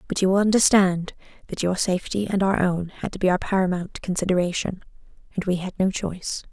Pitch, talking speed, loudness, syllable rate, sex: 185 Hz, 195 wpm, -23 LUFS, 6.0 syllables/s, female